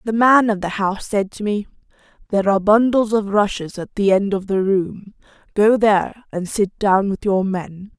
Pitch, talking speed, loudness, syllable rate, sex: 200 Hz, 205 wpm, -18 LUFS, 4.9 syllables/s, female